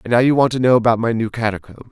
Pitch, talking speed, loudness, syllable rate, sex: 115 Hz, 315 wpm, -16 LUFS, 7.2 syllables/s, male